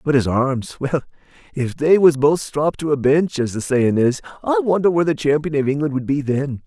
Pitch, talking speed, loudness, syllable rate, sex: 140 Hz, 225 wpm, -18 LUFS, 5.3 syllables/s, male